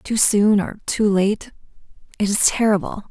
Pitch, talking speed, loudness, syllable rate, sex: 205 Hz, 155 wpm, -19 LUFS, 4.3 syllables/s, female